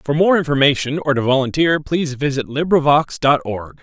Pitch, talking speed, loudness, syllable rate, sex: 145 Hz, 175 wpm, -17 LUFS, 5.4 syllables/s, male